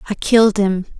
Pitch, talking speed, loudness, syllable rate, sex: 205 Hz, 180 wpm, -15 LUFS, 5.8 syllables/s, female